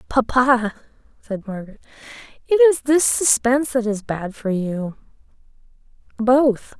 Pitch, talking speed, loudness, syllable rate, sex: 240 Hz, 115 wpm, -19 LUFS, 4.2 syllables/s, female